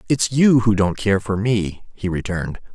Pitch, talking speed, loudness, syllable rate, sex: 105 Hz, 195 wpm, -19 LUFS, 4.6 syllables/s, male